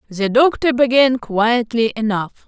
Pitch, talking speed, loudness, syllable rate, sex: 235 Hz, 120 wpm, -16 LUFS, 4.2 syllables/s, female